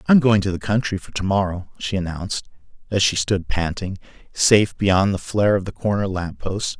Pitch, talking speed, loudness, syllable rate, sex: 95 Hz, 205 wpm, -21 LUFS, 5.3 syllables/s, male